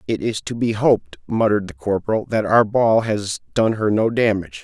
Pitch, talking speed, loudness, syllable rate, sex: 105 Hz, 205 wpm, -19 LUFS, 5.4 syllables/s, male